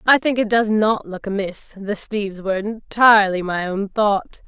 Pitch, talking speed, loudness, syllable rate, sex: 205 Hz, 190 wpm, -19 LUFS, 4.7 syllables/s, female